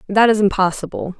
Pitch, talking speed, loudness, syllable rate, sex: 200 Hz, 150 wpm, -17 LUFS, 6.0 syllables/s, female